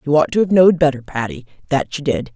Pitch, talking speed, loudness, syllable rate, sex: 140 Hz, 255 wpm, -17 LUFS, 6.6 syllables/s, female